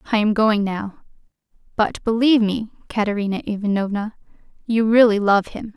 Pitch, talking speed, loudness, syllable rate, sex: 210 Hz, 135 wpm, -19 LUFS, 5.3 syllables/s, female